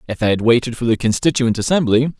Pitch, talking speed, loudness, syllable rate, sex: 125 Hz, 220 wpm, -17 LUFS, 6.4 syllables/s, male